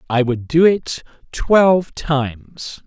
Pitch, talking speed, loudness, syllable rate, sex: 145 Hz, 125 wpm, -16 LUFS, 3.3 syllables/s, male